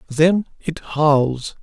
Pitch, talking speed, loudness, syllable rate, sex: 155 Hz, 110 wpm, -18 LUFS, 2.4 syllables/s, male